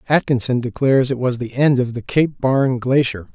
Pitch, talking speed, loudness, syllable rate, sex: 130 Hz, 195 wpm, -18 LUFS, 5.4 syllables/s, male